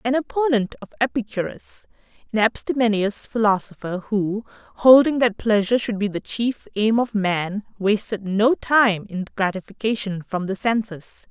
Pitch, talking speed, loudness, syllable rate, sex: 215 Hz, 140 wpm, -21 LUFS, 4.6 syllables/s, female